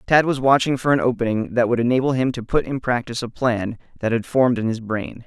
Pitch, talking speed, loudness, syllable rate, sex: 120 Hz, 250 wpm, -20 LUFS, 6.1 syllables/s, male